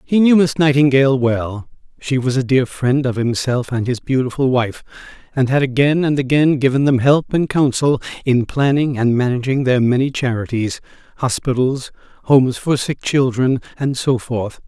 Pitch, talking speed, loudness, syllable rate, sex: 130 Hz, 170 wpm, -17 LUFS, 4.9 syllables/s, male